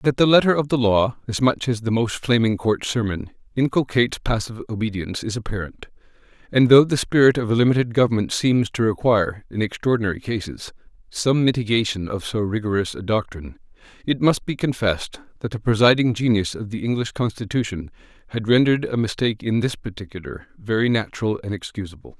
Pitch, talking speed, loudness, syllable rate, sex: 115 Hz, 170 wpm, -21 LUFS, 6.0 syllables/s, male